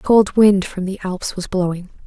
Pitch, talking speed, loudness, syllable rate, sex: 190 Hz, 230 wpm, -18 LUFS, 4.9 syllables/s, female